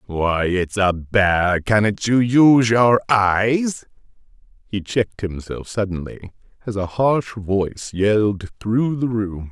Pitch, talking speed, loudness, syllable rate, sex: 105 Hz, 130 wpm, -19 LUFS, 3.6 syllables/s, male